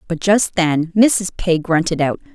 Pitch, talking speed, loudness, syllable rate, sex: 185 Hz, 180 wpm, -16 LUFS, 4.1 syllables/s, female